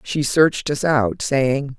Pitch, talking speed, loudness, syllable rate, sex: 135 Hz, 170 wpm, -19 LUFS, 3.6 syllables/s, female